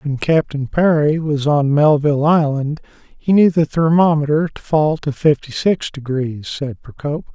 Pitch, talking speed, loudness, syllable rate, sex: 150 Hz, 155 wpm, -16 LUFS, 4.5 syllables/s, male